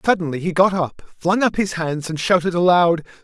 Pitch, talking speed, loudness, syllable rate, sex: 175 Hz, 205 wpm, -19 LUFS, 5.2 syllables/s, male